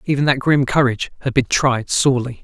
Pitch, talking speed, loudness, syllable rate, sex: 130 Hz, 195 wpm, -17 LUFS, 6.0 syllables/s, male